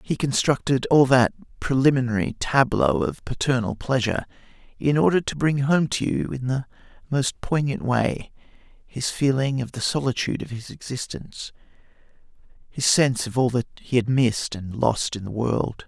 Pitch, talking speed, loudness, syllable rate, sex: 130 Hz, 160 wpm, -23 LUFS, 5.0 syllables/s, male